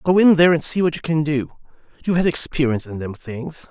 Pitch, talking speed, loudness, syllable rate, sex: 150 Hz, 245 wpm, -19 LUFS, 6.4 syllables/s, male